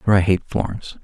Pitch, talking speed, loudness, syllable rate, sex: 95 Hz, 230 wpm, -20 LUFS, 6.7 syllables/s, male